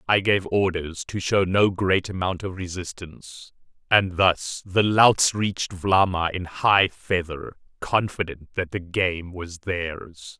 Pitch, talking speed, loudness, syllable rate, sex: 90 Hz, 145 wpm, -23 LUFS, 3.7 syllables/s, male